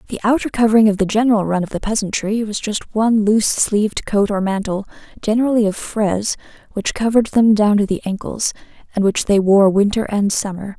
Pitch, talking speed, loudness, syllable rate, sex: 210 Hz, 195 wpm, -17 LUFS, 5.9 syllables/s, female